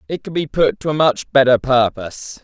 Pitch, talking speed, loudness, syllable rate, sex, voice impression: 135 Hz, 220 wpm, -16 LUFS, 5.3 syllables/s, male, masculine, adult-like, slightly bright, soft, slightly raspy, slightly refreshing, calm, friendly, reassuring, wild, lively, kind, light